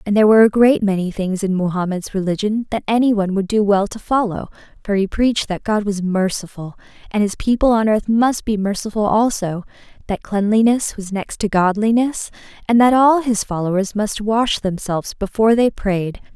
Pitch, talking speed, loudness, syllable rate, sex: 210 Hz, 185 wpm, -17 LUFS, 5.4 syllables/s, female